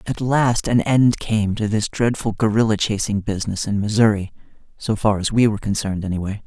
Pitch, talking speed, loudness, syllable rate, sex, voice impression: 105 Hz, 185 wpm, -20 LUFS, 5.6 syllables/s, male, masculine, adult-like, slightly fluent, refreshing, slightly sincere, friendly